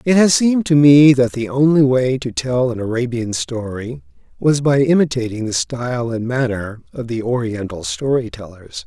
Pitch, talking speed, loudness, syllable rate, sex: 125 Hz, 175 wpm, -16 LUFS, 4.8 syllables/s, male